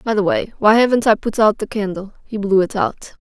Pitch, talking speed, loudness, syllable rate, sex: 210 Hz, 260 wpm, -17 LUFS, 5.5 syllables/s, female